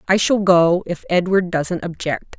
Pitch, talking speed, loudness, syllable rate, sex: 180 Hz, 175 wpm, -18 LUFS, 4.2 syllables/s, female